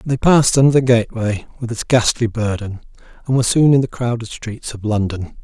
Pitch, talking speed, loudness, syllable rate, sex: 120 Hz, 200 wpm, -17 LUFS, 5.7 syllables/s, male